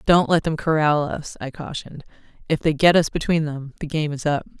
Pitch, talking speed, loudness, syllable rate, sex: 155 Hz, 220 wpm, -21 LUFS, 5.5 syllables/s, female